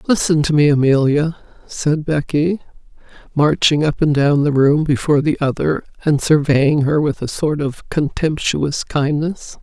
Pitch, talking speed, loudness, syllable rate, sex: 150 Hz, 150 wpm, -16 LUFS, 4.4 syllables/s, female